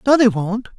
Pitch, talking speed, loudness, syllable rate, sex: 225 Hz, 230 wpm, -17 LUFS, 5.1 syllables/s, male